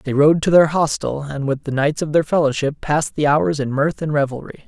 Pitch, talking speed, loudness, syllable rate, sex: 150 Hz, 245 wpm, -18 LUFS, 5.5 syllables/s, male